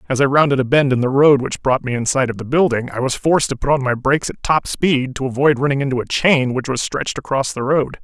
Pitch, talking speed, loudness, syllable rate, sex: 135 Hz, 290 wpm, -17 LUFS, 6.1 syllables/s, male